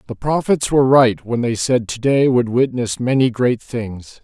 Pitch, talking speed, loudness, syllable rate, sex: 120 Hz, 185 wpm, -17 LUFS, 4.4 syllables/s, male